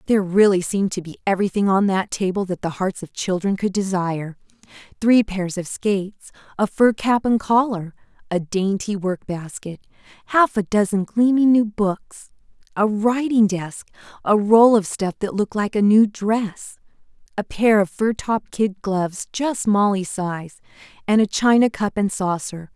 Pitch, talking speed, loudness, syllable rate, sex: 200 Hz, 165 wpm, -20 LUFS, 4.7 syllables/s, female